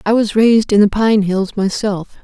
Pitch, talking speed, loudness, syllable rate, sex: 210 Hz, 215 wpm, -14 LUFS, 4.8 syllables/s, female